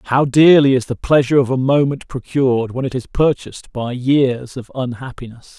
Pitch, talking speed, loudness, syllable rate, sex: 130 Hz, 185 wpm, -16 LUFS, 5.1 syllables/s, male